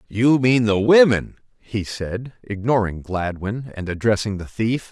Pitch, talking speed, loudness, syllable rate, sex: 110 Hz, 145 wpm, -20 LUFS, 4.0 syllables/s, male